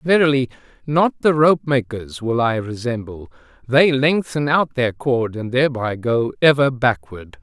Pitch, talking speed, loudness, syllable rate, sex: 130 Hz, 145 wpm, -18 LUFS, 4.4 syllables/s, male